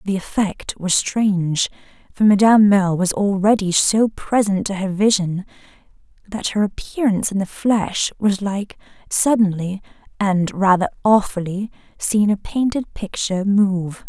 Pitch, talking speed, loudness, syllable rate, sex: 200 Hz, 130 wpm, -18 LUFS, 4.4 syllables/s, female